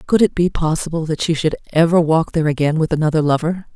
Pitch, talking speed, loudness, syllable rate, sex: 160 Hz, 225 wpm, -17 LUFS, 6.5 syllables/s, female